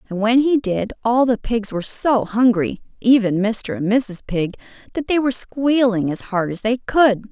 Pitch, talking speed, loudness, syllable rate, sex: 225 Hz, 195 wpm, -19 LUFS, 4.7 syllables/s, female